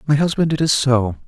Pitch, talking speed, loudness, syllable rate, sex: 140 Hz, 235 wpm, -17 LUFS, 5.9 syllables/s, male